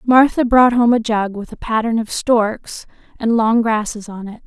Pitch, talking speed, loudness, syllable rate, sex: 225 Hz, 200 wpm, -16 LUFS, 4.5 syllables/s, female